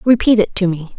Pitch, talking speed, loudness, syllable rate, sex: 205 Hz, 245 wpm, -15 LUFS, 5.7 syllables/s, female